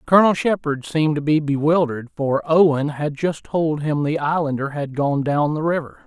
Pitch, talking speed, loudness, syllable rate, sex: 150 Hz, 190 wpm, -20 LUFS, 5.2 syllables/s, male